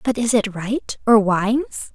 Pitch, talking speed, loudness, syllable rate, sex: 220 Hz, 185 wpm, -19 LUFS, 3.4 syllables/s, female